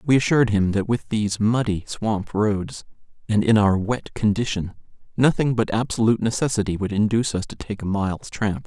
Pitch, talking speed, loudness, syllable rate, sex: 110 Hz, 180 wpm, -22 LUFS, 5.5 syllables/s, male